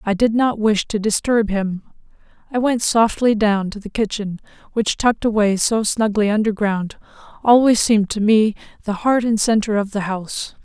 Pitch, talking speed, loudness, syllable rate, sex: 215 Hz, 175 wpm, -18 LUFS, 4.9 syllables/s, female